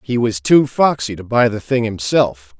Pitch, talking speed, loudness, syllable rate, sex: 115 Hz, 210 wpm, -16 LUFS, 4.5 syllables/s, male